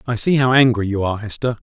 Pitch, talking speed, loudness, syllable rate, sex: 115 Hz, 250 wpm, -17 LUFS, 6.9 syllables/s, male